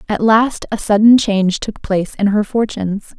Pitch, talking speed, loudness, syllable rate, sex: 210 Hz, 190 wpm, -15 LUFS, 5.1 syllables/s, female